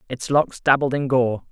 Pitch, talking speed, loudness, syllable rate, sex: 130 Hz, 200 wpm, -20 LUFS, 4.7 syllables/s, male